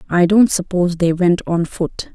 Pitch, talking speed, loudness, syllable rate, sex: 180 Hz, 195 wpm, -16 LUFS, 4.7 syllables/s, female